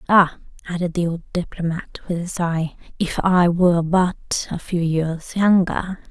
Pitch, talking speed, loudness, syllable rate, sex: 175 Hz, 155 wpm, -21 LUFS, 4.2 syllables/s, female